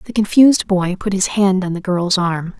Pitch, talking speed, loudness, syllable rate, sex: 190 Hz, 230 wpm, -16 LUFS, 4.8 syllables/s, female